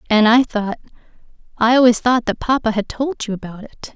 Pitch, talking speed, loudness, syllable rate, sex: 230 Hz, 180 wpm, -17 LUFS, 5.4 syllables/s, female